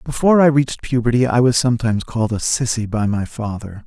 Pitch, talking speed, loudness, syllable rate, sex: 120 Hz, 200 wpm, -17 LUFS, 6.4 syllables/s, male